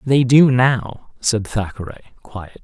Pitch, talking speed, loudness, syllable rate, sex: 120 Hz, 135 wpm, -16 LUFS, 3.9 syllables/s, male